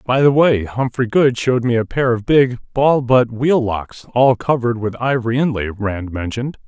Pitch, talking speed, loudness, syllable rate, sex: 120 Hz, 200 wpm, -17 LUFS, 5.1 syllables/s, male